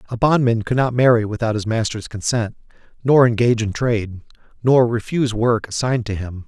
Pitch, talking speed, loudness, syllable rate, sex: 115 Hz, 175 wpm, -19 LUFS, 5.7 syllables/s, male